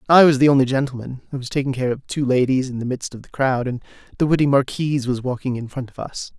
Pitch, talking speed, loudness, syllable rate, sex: 130 Hz, 265 wpm, -20 LUFS, 6.5 syllables/s, male